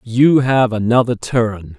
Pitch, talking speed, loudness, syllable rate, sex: 120 Hz, 135 wpm, -15 LUFS, 3.6 syllables/s, male